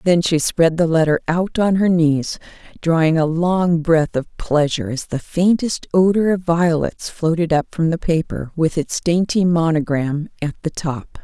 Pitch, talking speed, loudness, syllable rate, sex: 165 Hz, 175 wpm, -18 LUFS, 4.4 syllables/s, female